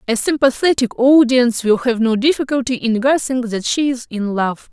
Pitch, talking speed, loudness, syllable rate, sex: 245 Hz, 180 wpm, -16 LUFS, 5.2 syllables/s, female